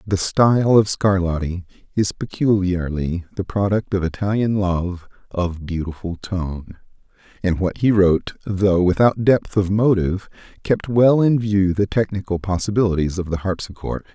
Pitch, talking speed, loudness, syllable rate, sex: 95 Hz, 140 wpm, -20 LUFS, 4.6 syllables/s, male